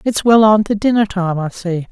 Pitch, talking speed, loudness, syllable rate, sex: 200 Hz, 250 wpm, -14 LUFS, 5.0 syllables/s, female